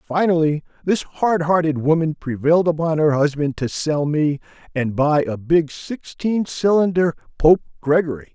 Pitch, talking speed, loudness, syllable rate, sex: 160 Hz, 145 wpm, -19 LUFS, 4.6 syllables/s, male